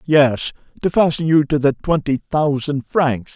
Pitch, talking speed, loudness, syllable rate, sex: 145 Hz, 160 wpm, -18 LUFS, 4.2 syllables/s, male